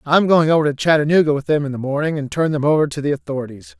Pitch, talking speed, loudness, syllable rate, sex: 150 Hz, 270 wpm, -17 LUFS, 7.1 syllables/s, male